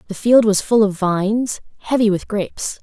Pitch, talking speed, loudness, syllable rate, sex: 210 Hz, 190 wpm, -17 LUFS, 5.0 syllables/s, female